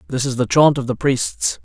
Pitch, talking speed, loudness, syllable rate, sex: 120 Hz, 255 wpm, -17 LUFS, 4.8 syllables/s, male